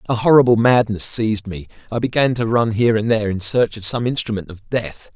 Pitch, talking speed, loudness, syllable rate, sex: 115 Hz, 220 wpm, -18 LUFS, 5.9 syllables/s, male